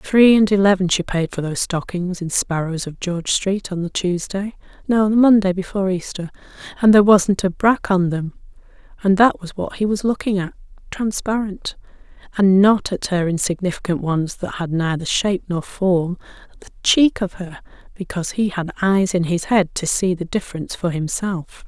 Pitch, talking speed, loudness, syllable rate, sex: 190 Hz, 185 wpm, -19 LUFS, 5.1 syllables/s, female